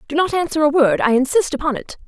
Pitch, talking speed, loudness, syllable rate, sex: 295 Hz, 260 wpm, -17 LUFS, 6.5 syllables/s, female